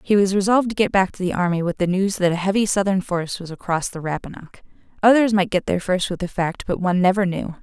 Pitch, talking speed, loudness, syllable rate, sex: 190 Hz, 260 wpm, -20 LUFS, 6.6 syllables/s, female